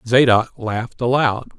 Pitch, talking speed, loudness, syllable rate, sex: 120 Hz, 115 wpm, -18 LUFS, 4.4 syllables/s, male